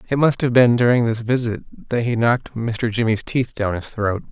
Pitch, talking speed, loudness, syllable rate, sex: 115 Hz, 220 wpm, -19 LUFS, 5.0 syllables/s, male